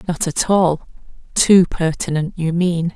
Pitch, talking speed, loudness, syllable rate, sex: 170 Hz, 120 wpm, -17 LUFS, 4.0 syllables/s, female